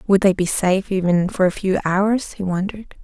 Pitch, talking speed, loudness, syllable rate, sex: 190 Hz, 215 wpm, -19 LUFS, 5.3 syllables/s, female